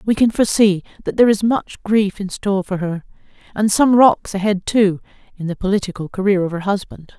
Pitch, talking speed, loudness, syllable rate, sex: 200 Hz, 200 wpm, -17 LUFS, 5.7 syllables/s, female